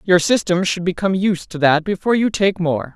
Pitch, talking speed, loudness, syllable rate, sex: 180 Hz, 225 wpm, -18 LUFS, 5.6 syllables/s, female